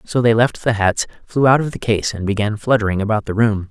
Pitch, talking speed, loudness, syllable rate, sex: 110 Hz, 260 wpm, -17 LUFS, 5.8 syllables/s, male